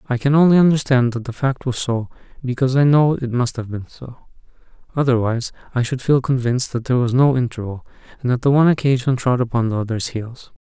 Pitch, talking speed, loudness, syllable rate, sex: 125 Hz, 210 wpm, -18 LUFS, 6.2 syllables/s, male